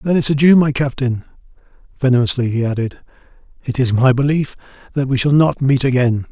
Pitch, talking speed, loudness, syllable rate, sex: 130 Hz, 170 wpm, -16 LUFS, 5.8 syllables/s, male